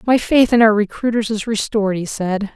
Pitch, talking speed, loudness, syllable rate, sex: 215 Hz, 210 wpm, -17 LUFS, 5.4 syllables/s, female